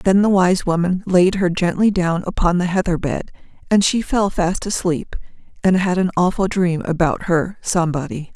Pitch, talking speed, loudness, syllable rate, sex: 180 Hz, 180 wpm, -18 LUFS, 4.9 syllables/s, female